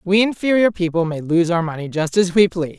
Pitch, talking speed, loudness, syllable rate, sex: 180 Hz, 235 wpm, -18 LUFS, 6.0 syllables/s, female